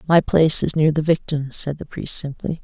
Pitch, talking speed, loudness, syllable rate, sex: 155 Hz, 225 wpm, -19 LUFS, 5.3 syllables/s, female